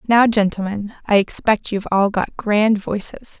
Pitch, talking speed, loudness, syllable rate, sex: 210 Hz, 160 wpm, -18 LUFS, 4.6 syllables/s, female